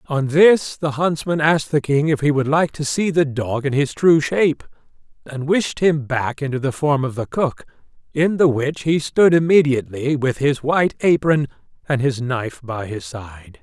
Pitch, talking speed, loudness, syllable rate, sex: 145 Hz, 200 wpm, -18 LUFS, 4.7 syllables/s, male